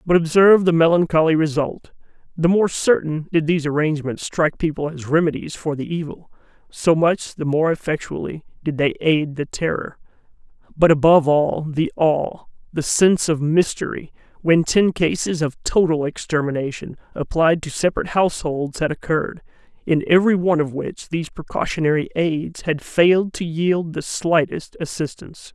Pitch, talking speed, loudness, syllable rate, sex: 160 Hz, 150 wpm, -19 LUFS, 5.3 syllables/s, male